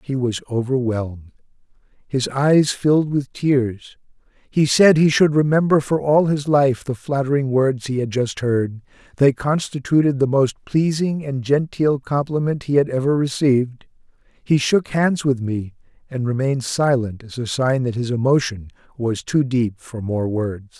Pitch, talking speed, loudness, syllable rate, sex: 135 Hz, 160 wpm, -19 LUFS, 4.5 syllables/s, male